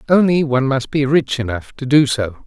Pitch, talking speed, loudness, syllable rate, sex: 135 Hz, 220 wpm, -17 LUFS, 5.2 syllables/s, male